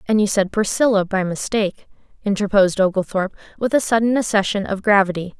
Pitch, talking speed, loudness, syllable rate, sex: 200 Hz, 155 wpm, -19 LUFS, 6.3 syllables/s, female